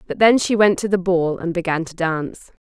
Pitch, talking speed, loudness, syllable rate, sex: 180 Hz, 250 wpm, -19 LUFS, 5.4 syllables/s, female